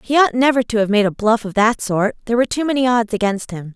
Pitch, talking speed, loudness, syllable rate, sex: 230 Hz, 290 wpm, -17 LUFS, 6.5 syllables/s, female